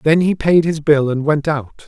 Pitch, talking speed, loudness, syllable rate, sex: 150 Hz, 255 wpm, -16 LUFS, 4.5 syllables/s, male